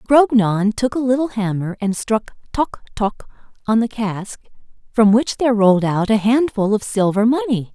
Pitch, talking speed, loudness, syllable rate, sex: 225 Hz, 170 wpm, -18 LUFS, 4.7 syllables/s, female